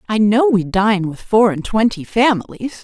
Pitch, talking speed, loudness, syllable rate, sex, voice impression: 210 Hz, 190 wpm, -16 LUFS, 4.7 syllables/s, female, very feminine, adult-like, slightly middle-aged, thin, slightly tensed, slightly weak, bright, hard, clear, fluent, slightly raspy, slightly cool, very intellectual, slightly refreshing, sincere, very calm, friendly, reassuring, very elegant, sweet, kind